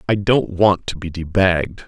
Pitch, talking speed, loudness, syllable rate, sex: 90 Hz, 190 wpm, -18 LUFS, 4.9 syllables/s, male